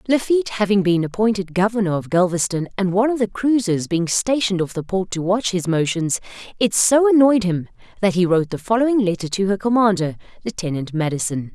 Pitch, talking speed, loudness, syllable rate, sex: 195 Hz, 185 wpm, -19 LUFS, 5.9 syllables/s, female